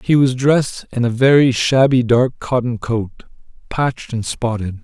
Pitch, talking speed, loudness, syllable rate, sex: 125 Hz, 160 wpm, -16 LUFS, 4.5 syllables/s, male